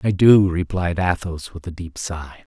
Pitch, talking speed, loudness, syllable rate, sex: 85 Hz, 190 wpm, -19 LUFS, 4.2 syllables/s, male